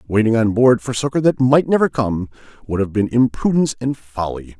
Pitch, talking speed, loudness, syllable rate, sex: 120 Hz, 195 wpm, -17 LUFS, 5.5 syllables/s, male